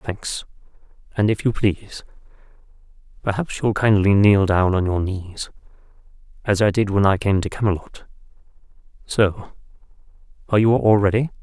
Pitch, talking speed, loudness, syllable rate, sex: 100 Hz, 135 wpm, -19 LUFS, 5.1 syllables/s, male